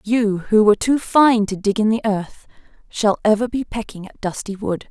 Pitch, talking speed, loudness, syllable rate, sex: 215 Hz, 210 wpm, -18 LUFS, 4.9 syllables/s, female